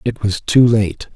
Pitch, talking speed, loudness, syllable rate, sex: 110 Hz, 210 wpm, -15 LUFS, 4.0 syllables/s, male